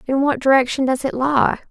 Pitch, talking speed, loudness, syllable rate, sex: 265 Hz, 210 wpm, -18 LUFS, 5.4 syllables/s, female